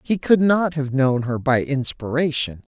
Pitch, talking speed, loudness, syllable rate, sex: 145 Hz, 175 wpm, -20 LUFS, 4.3 syllables/s, male